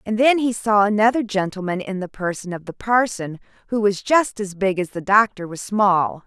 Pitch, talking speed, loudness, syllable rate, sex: 205 Hz, 210 wpm, -20 LUFS, 5.0 syllables/s, female